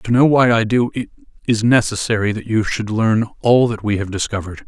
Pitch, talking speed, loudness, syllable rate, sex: 110 Hz, 220 wpm, -17 LUFS, 5.7 syllables/s, male